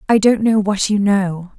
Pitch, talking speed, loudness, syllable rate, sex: 205 Hz, 225 wpm, -16 LUFS, 4.4 syllables/s, female